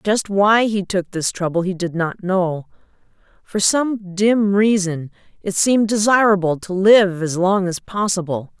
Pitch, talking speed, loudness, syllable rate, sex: 190 Hz, 160 wpm, -18 LUFS, 4.2 syllables/s, female